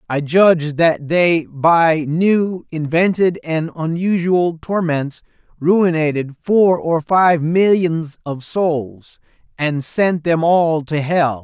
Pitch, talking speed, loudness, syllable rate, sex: 165 Hz, 120 wpm, -16 LUFS, 3.1 syllables/s, male